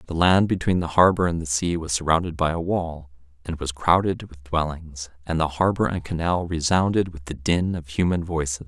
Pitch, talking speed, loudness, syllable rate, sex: 85 Hz, 205 wpm, -23 LUFS, 5.2 syllables/s, male